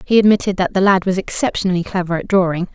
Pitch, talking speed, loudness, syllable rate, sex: 185 Hz, 220 wpm, -16 LUFS, 7.0 syllables/s, female